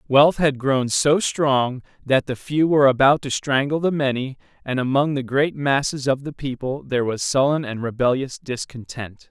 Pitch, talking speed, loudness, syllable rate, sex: 135 Hz, 180 wpm, -20 LUFS, 4.7 syllables/s, male